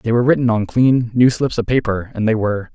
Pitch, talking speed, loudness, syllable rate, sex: 115 Hz, 260 wpm, -16 LUFS, 6.1 syllables/s, male